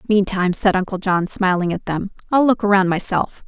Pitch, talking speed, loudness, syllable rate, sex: 195 Hz, 190 wpm, -18 LUFS, 5.5 syllables/s, female